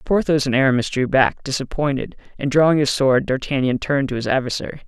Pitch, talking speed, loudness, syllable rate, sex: 135 Hz, 185 wpm, -19 LUFS, 6.2 syllables/s, male